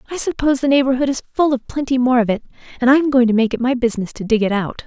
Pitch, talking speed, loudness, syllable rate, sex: 250 Hz, 295 wpm, -17 LUFS, 7.5 syllables/s, female